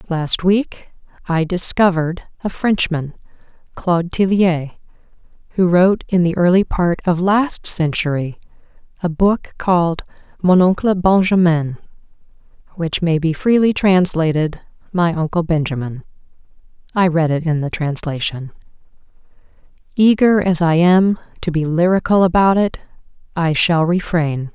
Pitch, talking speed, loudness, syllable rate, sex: 175 Hz, 120 wpm, -16 LUFS, 4.2 syllables/s, female